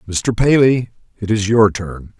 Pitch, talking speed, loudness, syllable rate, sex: 110 Hz, 165 wpm, -15 LUFS, 4.1 syllables/s, male